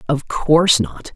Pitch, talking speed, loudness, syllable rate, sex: 150 Hz, 155 wpm, -16 LUFS, 4.1 syllables/s, female